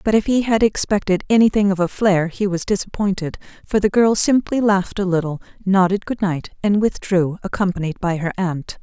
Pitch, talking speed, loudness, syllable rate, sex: 195 Hz, 190 wpm, -19 LUFS, 5.5 syllables/s, female